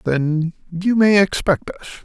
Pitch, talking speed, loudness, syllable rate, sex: 180 Hz, 145 wpm, -18 LUFS, 4.0 syllables/s, male